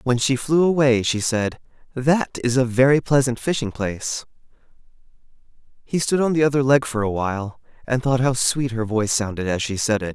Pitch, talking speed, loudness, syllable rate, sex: 125 Hz, 195 wpm, -20 LUFS, 5.4 syllables/s, male